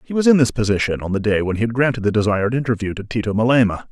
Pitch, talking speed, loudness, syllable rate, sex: 115 Hz, 275 wpm, -18 LUFS, 7.4 syllables/s, male